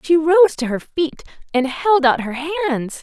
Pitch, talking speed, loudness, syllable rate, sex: 300 Hz, 200 wpm, -18 LUFS, 5.5 syllables/s, female